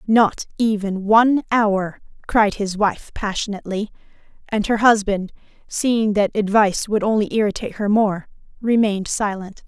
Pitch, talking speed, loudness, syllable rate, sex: 210 Hz, 130 wpm, -19 LUFS, 4.8 syllables/s, female